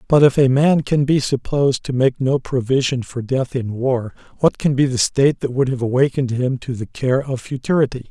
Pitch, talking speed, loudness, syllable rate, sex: 130 Hz, 220 wpm, -18 LUFS, 5.4 syllables/s, male